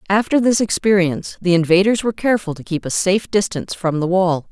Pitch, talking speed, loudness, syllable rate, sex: 185 Hz, 200 wpm, -17 LUFS, 6.3 syllables/s, female